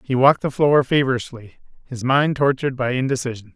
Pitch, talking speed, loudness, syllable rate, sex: 130 Hz, 170 wpm, -19 LUFS, 5.9 syllables/s, male